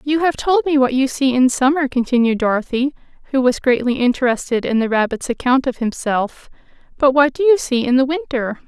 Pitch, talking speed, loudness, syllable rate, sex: 265 Hz, 200 wpm, -17 LUFS, 5.5 syllables/s, female